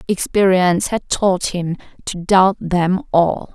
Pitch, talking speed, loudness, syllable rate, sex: 180 Hz, 135 wpm, -17 LUFS, 3.6 syllables/s, female